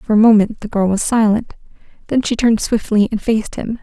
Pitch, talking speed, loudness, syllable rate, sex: 215 Hz, 220 wpm, -16 LUFS, 5.8 syllables/s, female